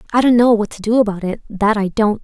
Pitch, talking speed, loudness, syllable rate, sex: 215 Hz, 295 wpm, -16 LUFS, 6.2 syllables/s, female